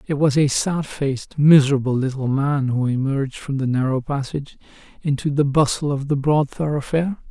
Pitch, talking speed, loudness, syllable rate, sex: 140 Hz, 170 wpm, -20 LUFS, 5.4 syllables/s, male